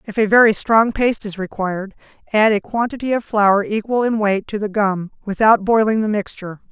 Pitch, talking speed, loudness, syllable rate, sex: 210 Hz, 195 wpm, -17 LUFS, 5.5 syllables/s, female